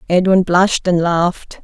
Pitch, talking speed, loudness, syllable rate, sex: 180 Hz, 145 wpm, -14 LUFS, 4.8 syllables/s, female